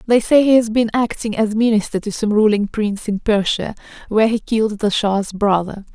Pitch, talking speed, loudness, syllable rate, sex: 215 Hz, 200 wpm, -17 LUFS, 5.4 syllables/s, female